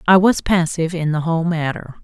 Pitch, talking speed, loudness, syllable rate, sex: 165 Hz, 205 wpm, -18 LUFS, 6.0 syllables/s, female